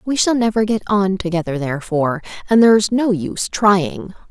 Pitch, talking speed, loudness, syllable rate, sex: 195 Hz, 165 wpm, -17 LUFS, 5.3 syllables/s, female